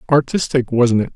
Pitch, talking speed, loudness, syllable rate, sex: 130 Hz, 155 wpm, -17 LUFS, 5.3 syllables/s, male